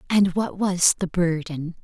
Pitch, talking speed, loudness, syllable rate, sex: 180 Hz, 165 wpm, -22 LUFS, 4.0 syllables/s, female